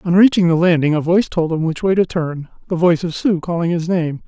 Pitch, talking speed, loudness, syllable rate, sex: 170 Hz, 255 wpm, -17 LUFS, 6.1 syllables/s, male